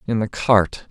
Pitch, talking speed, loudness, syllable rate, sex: 110 Hz, 200 wpm, -19 LUFS, 3.9 syllables/s, male